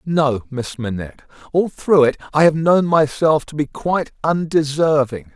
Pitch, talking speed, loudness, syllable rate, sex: 145 Hz, 155 wpm, -18 LUFS, 4.5 syllables/s, male